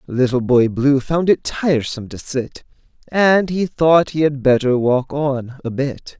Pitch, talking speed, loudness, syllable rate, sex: 140 Hz, 175 wpm, -17 LUFS, 4.1 syllables/s, male